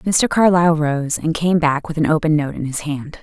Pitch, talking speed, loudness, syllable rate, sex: 155 Hz, 240 wpm, -17 LUFS, 5.1 syllables/s, female